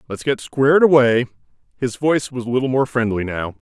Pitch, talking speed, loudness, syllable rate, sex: 125 Hz, 195 wpm, -18 LUFS, 5.8 syllables/s, male